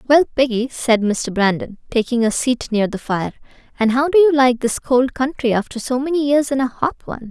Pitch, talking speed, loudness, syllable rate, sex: 250 Hz, 220 wpm, -18 LUFS, 5.4 syllables/s, female